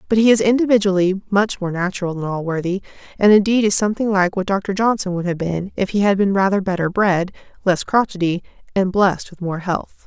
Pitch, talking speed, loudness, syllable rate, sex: 195 Hz, 205 wpm, -18 LUFS, 5.8 syllables/s, female